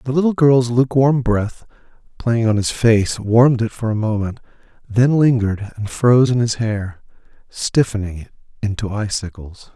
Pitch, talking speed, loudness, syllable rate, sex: 115 Hz, 155 wpm, -17 LUFS, 4.9 syllables/s, male